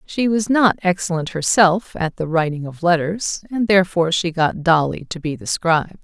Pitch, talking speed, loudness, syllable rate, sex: 175 Hz, 190 wpm, -18 LUFS, 5.0 syllables/s, female